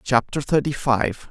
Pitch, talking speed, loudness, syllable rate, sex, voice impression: 130 Hz, 140 wpm, -21 LUFS, 4.1 syllables/s, male, masculine, very adult-like, middle-aged, thick, slightly relaxed, slightly weak, bright, slightly soft, clear, very fluent, cool, very intellectual, slightly refreshing, sincere, very calm, slightly mature, friendly, very reassuring, slightly unique, very elegant, slightly sweet, lively, kind, slightly modest